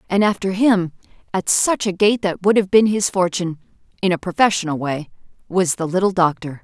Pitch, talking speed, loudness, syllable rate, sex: 185 Hz, 190 wpm, -18 LUFS, 5.5 syllables/s, female